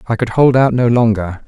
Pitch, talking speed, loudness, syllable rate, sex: 120 Hz, 245 wpm, -13 LUFS, 5.3 syllables/s, male